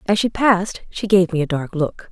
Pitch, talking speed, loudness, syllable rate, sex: 185 Hz, 255 wpm, -19 LUFS, 5.3 syllables/s, female